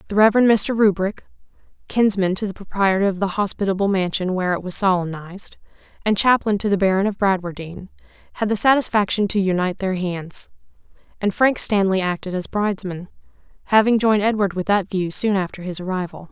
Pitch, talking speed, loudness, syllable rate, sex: 195 Hz, 170 wpm, -20 LUFS, 6.1 syllables/s, female